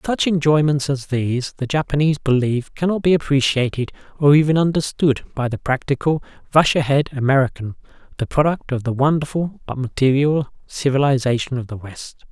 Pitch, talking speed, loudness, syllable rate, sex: 140 Hz, 145 wpm, -19 LUFS, 5.7 syllables/s, male